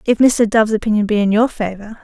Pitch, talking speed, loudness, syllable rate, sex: 215 Hz, 235 wpm, -15 LUFS, 6.3 syllables/s, female